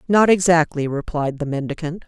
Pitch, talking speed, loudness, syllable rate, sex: 160 Hz, 145 wpm, -19 LUFS, 5.3 syllables/s, female